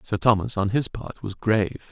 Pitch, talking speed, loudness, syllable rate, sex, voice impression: 105 Hz, 220 wpm, -24 LUFS, 5.4 syllables/s, male, masculine, very adult-like, slightly thick, cool, intellectual, calm, slightly elegant